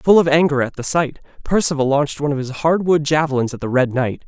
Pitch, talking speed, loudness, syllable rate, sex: 145 Hz, 255 wpm, -18 LUFS, 6.3 syllables/s, male